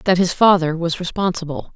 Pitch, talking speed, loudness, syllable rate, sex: 175 Hz, 170 wpm, -18 LUFS, 5.3 syllables/s, female